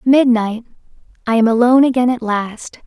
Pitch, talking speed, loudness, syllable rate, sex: 235 Hz, 125 wpm, -14 LUFS, 5.2 syllables/s, female